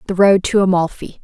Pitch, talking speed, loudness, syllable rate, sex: 190 Hz, 195 wpm, -15 LUFS, 5.7 syllables/s, female